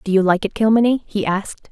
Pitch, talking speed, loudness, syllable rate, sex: 205 Hz, 245 wpm, -18 LUFS, 6.4 syllables/s, female